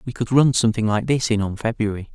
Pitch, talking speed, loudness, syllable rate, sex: 115 Hz, 250 wpm, -20 LUFS, 6.4 syllables/s, male